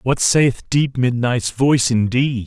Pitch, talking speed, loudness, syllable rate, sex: 125 Hz, 145 wpm, -17 LUFS, 3.7 syllables/s, male